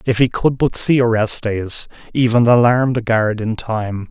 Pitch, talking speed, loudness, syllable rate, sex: 115 Hz, 175 wpm, -16 LUFS, 4.3 syllables/s, male